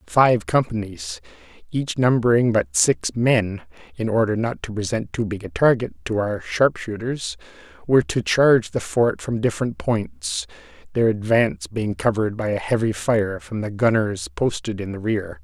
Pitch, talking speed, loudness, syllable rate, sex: 115 Hz, 165 wpm, -21 LUFS, 4.6 syllables/s, male